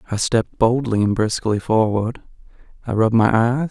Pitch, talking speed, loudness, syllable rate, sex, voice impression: 115 Hz, 160 wpm, -19 LUFS, 5.2 syllables/s, male, masculine, adult-like, slightly relaxed, slightly weak, slightly dark, soft, slightly raspy, cool, calm, reassuring, wild, slightly kind, slightly modest